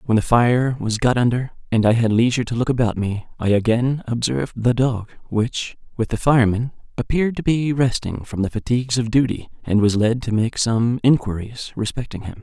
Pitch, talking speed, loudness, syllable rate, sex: 120 Hz, 200 wpm, -20 LUFS, 5.5 syllables/s, male